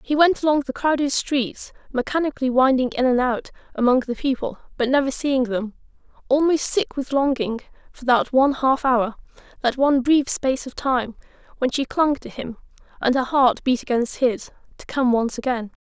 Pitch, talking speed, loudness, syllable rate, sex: 265 Hz, 170 wpm, -21 LUFS, 5.2 syllables/s, female